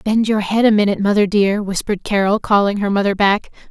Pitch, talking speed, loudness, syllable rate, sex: 205 Hz, 210 wpm, -16 LUFS, 6.1 syllables/s, female